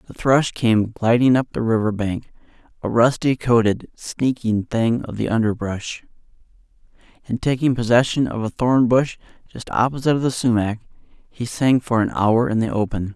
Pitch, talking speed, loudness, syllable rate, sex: 115 Hz, 160 wpm, -20 LUFS, 4.6 syllables/s, male